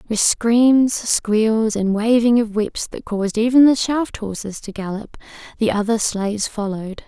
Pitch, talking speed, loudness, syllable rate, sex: 220 Hz, 155 wpm, -18 LUFS, 4.2 syllables/s, female